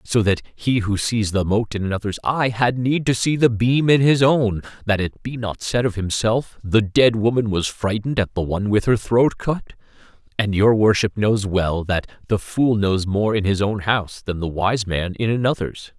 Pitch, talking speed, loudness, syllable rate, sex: 110 Hz, 220 wpm, -20 LUFS, 4.8 syllables/s, male